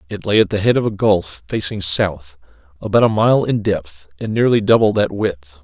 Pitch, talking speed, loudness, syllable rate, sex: 95 Hz, 215 wpm, -16 LUFS, 5.0 syllables/s, male